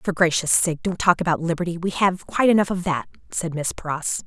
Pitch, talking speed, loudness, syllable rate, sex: 170 Hz, 225 wpm, -22 LUFS, 5.7 syllables/s, female